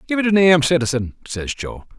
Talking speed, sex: 210 wpm, male